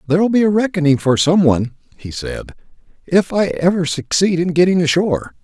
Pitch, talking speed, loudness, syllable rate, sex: 170 Hz, 175 wpm, -16 LUFS, 5.8 syllables/s, male